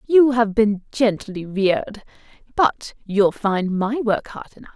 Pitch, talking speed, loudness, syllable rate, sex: 215 Hz, 150 wpm, -20 LUFS, 4.0 syllables/s, female